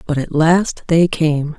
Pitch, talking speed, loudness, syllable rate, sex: 160 Hz, 190 wpm, -16 LUFS, 3.6 syllables/s, female